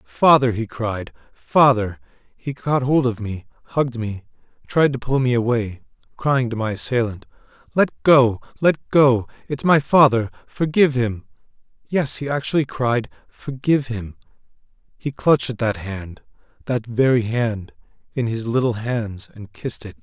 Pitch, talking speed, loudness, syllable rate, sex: 120 Hz, 145 wpm, -20 LUFS, 4.4 syllables/s, male